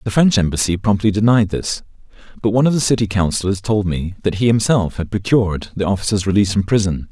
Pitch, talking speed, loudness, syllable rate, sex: 100 Hz, 200 wpm, -17 LUFS, 6.4 syllables/s, male